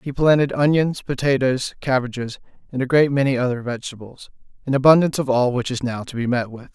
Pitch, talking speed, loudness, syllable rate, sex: 130 Hz, 195 wpm, -20 LUFS, 6.1 syllables/s, male